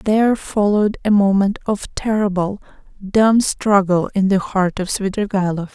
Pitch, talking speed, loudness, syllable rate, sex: 200 Hz, 135 wpm, -17 LUFS, 4.5 syllables/s, female